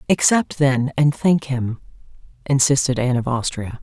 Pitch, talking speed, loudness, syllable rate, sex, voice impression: 135 Hz, 140 wpm, -19 LUFS, 4.7 syllables/s, female, feminine, adult-like, slightly intellectual, slightly calm, elegant, slightly strict